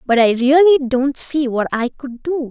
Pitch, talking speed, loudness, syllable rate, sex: 265 Hz, 215 wpm, -15 LUFS, 4.8 syllables/s, female